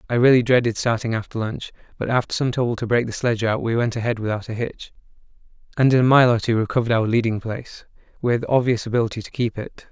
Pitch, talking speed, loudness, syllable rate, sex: 115 Hz, 225 wpm, -21 LUFS, 6.7 syllables/s, male